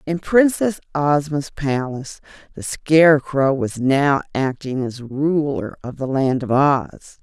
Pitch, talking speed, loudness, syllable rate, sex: 145 Hz, 135 wpm, -19 LUFS, 3.8 syllables/s, female